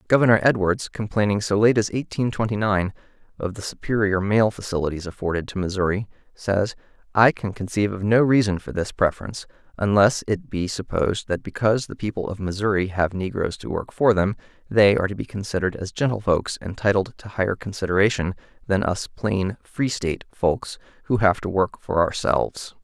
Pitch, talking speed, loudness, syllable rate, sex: 100 Hz, 175 wpm, -22 LUFS, 5.6 syllables/s, male